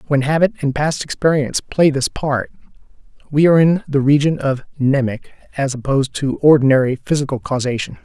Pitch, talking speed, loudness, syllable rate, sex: 140 Hz, 155 wpm, -17 LUFS, 5.8 syllables/s, male